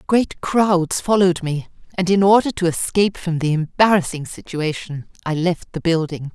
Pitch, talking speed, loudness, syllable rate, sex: 175 Hz, 160 wpm, -19 LUFS, 4.8 syllables/s, female